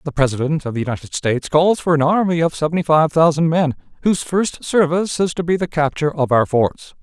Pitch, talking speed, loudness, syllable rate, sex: 155 Hz, 220 wpm, -18 LUFS, 6.1 syllables/s, male